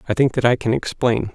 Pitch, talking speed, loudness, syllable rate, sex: 120 Hz, 270 wpm, -19 LUFS, 6.3 syllables/s, male